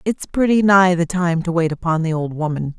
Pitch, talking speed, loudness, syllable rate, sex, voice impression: 175 Hz, 235 wpm, -17 LUFS, 5.2 syllables/s, female, feminine, middle-aged, tensed, powerful, slightly soft, clear, fluent, slightly raspy, intellectual, calm, friendly, elegant, lively, slightly sharp